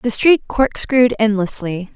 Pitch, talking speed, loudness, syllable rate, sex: 225 Hz, 125 wpm, -16 LUFS, 4.4 syllables/s, female